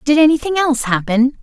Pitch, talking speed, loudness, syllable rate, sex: 275 Hz, 170 wpm, -15 LUFS, 6.1 syllables/s, female